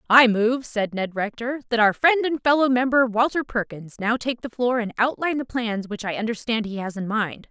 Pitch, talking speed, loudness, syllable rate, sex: 235 Hz, 225 wpm, -22 LUFS, 5.2 syllables/s, female